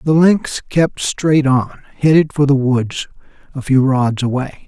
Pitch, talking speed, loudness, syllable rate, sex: 140 Hz, 165 wpm, -15 LUFS, 4.0 syllables/s, male